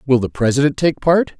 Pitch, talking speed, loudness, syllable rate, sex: 140 Hz, 215 wpm, -16 LUFS, 5.7 syllables/s, male